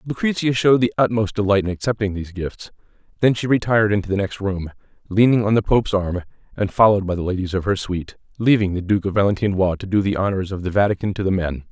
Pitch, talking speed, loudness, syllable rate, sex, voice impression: 100 Hz, 225 wpm, -20 LUFS, 6.7 syllables/s, male, masculine, adult-like, slightly thick, cool, slightly calm, slightly wild